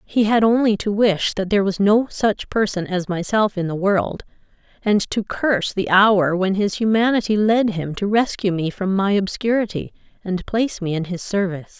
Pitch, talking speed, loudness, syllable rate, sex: 200 Hz, 195 wpm, -19 LUFS, 5.0 syllables/s, female